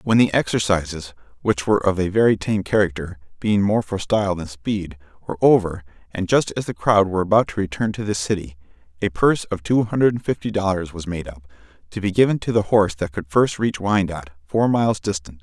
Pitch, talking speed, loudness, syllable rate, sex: 95 Hz, 200 wpm, -20 LUFS, 5.9 syllables/s, male